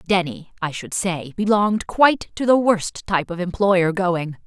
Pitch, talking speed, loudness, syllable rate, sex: 190 Hz, 175 wpm, -20 LUFS, 4.6 syllables/s, female